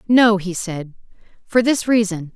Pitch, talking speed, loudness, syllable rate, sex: 205 Hz, 155 wpm, -18 LUFS, 4.2 syllables/s, female